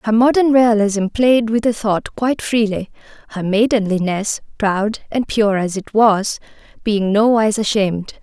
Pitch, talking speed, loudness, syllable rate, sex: 215 Hz, 145 wpm, -16 LUFS, 4.5 syllables/s, female